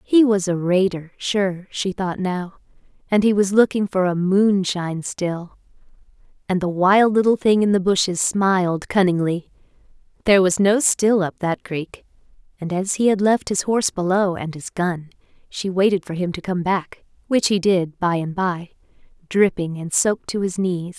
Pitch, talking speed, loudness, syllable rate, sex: 190 Hz, 175 wpm, -20 LUFS, 4.6 syllables/s, female